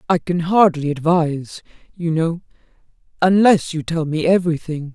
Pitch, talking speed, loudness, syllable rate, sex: 165 Hz, 135 wpm, -18 LUFS, 4.9 syllables/s, female